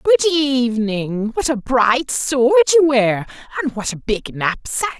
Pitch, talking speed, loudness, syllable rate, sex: 260 Hz, 155 wpm, -17 LUFS, 4.0 syllables/s, male